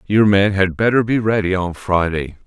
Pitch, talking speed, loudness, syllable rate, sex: 100 Hz, 195 wpm, -17 LUFS, 4.9 syllables/s, male